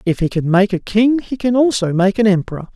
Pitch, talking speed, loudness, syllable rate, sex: 205 Hz, 260 wpm, -15 LUFS, 5.8 syllables/s, male